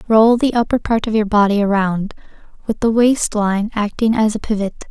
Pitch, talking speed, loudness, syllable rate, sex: 215 Hz, 195 wpm, -16 LUFS, 5.2 syllables/s, female